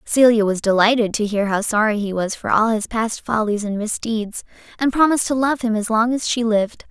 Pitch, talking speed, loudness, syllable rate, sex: 220 Hz, 225 wpm, -19 LUFS, 5.5 syllables/s, female